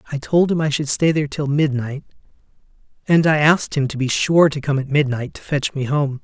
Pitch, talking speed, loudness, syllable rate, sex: 145 Hz, 230 wpm, -18 LUFS, 5.7 syllables/s, male